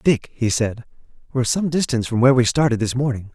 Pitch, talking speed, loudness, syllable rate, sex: 125 Hz, 215 wpm, -19 LUFS, 6.7 syllables/s, male